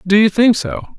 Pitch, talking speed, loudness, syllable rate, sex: 205 Hz, 245 wpm, -13 LUFS, 5.1 syllables/s, male